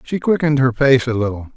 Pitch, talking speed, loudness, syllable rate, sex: 130 Hz, 230 wpm, -16 LUFS, 6.3 syllables/s, male